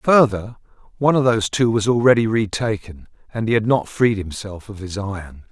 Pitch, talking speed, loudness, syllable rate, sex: 110 Hz, 175 wpm, -19 LUFS, 5.3 syllables/s, male